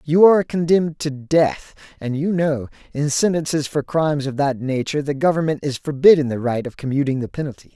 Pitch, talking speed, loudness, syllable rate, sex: 145 Hz, 195 wpm, -19 LUFS, 5.7 syllables/s, male